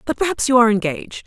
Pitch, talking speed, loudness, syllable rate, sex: 240 Hz, 235 wpm, -17 LUFS, 8.0 syllables/s, female